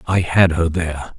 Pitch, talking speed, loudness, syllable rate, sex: 85 Hz, 205 wpm, -17 LUFS, 4.9 syllables/s, male